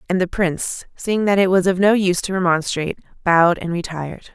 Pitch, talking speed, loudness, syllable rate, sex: 180 Hz, 205 wpm, -19 LUFS, 6.0 syllables/s, female